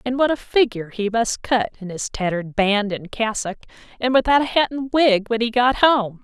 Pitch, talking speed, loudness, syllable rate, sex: 230 Hz, 220 wpm, -20 LUFS, 5.2 syllables/s, female